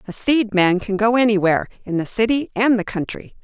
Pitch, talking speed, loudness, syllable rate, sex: 215 Hz, 210 wpm, -19 LUFS, 5.7 syllables/s, female